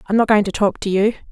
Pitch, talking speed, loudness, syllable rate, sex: 205 Hz, 320 wpm, -17 LUFS, 6.7 syllables/s, female